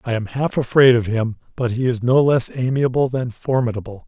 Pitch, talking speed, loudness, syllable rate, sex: 125 Hz, 205 wpm, -19 LUFS, 5.4 syllables/s, male